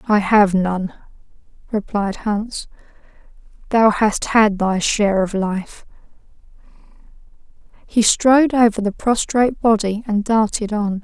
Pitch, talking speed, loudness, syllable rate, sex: 210 Hz, 115 wpm, -17 LUFS, 4.1 syllables/s, female